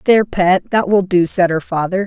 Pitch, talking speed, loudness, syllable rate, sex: 185 Hz, 230 wpm, -15 LUFS, 5.4 syllables/s, female